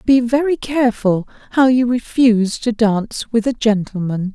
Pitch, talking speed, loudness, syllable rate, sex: 230 Hz, 150 wpm, -17 LUFS, 4.8 syllables/s, female